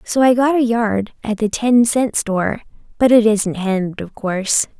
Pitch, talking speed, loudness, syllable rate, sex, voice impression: 220 Hz, 190 wpm, -17 LUFS, 4.6 syllables/s, female, very feminine, very young, very thin, tensed, slightly powerful, very bright, soft, clear, fluent, slightly raspy, very cute, slightly intellectual, very refreshing, sincere, slightly calm, very friendly, reassuring, very unique, very elegant, slightly wild, sweet, lively, very kind, slightly intense, slightly sharp, very light